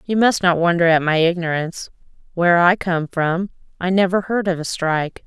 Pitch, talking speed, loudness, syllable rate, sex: 175 Hz, 195 wpm, -18 LUFS, 5.4 syllables/s, female